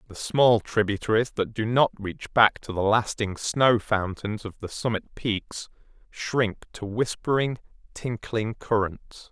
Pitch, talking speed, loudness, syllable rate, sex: 110 Hz, 140 wpm, -25 LUFS, 3.9 syllables/s, male